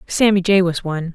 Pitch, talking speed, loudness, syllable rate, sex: 180 Hz, 210 wpm, -17 LUFS, 5.9 syllables/s, female